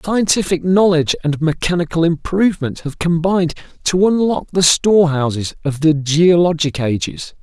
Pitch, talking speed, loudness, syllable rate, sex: 165 Hz, 120 wpm, -16 LUFS, 5.1 syllables/s, male